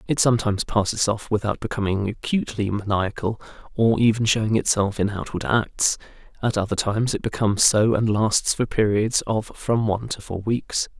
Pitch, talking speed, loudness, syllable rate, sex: 110 Hz, 170 wpm, -22 LUFS, 5.3 syllables/s, male